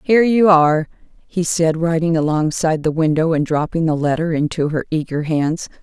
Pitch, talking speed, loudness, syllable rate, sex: 160 Hz, 175 wpm, -17 LUFS, 5.4 syllables/s, female